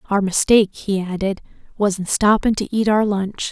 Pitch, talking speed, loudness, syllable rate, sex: 200 Hz, 190 wpm, -18 LUFS, 5.1 syllables/s, female